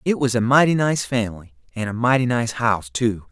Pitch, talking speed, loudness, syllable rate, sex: 120 Hz, 215 wpm, -20 LUFS, 5.7 syllables/s, male